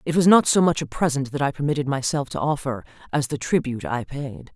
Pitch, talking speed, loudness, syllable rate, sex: 140 Hz, 235 wpm, -22 LUFS, 6.1 syllables/s, female